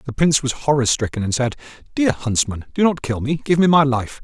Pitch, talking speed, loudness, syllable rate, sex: 135 Hz, 240 wpm, -19 LUFS, 5.9 syllables/s, male